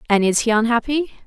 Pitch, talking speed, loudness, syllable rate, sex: 235 Hz, 190 wpm, -18 LUFS, 6.2 syllables/s, female